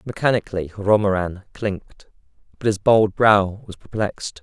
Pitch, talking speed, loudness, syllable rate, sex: 100 Hz, 120 wpm, -20 LUFS, 5.0 syllables/s, male